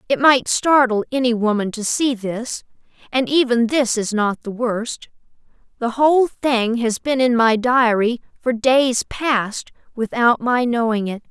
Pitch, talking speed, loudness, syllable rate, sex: 240 Hz, 160 wpm, -18 LUFS, 4.0 syllables/s, female